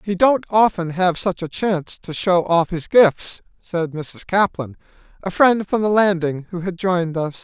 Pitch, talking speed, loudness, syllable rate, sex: 180 Hz, 195 wpm, -19 LUFS, 4.4 syllables/s, male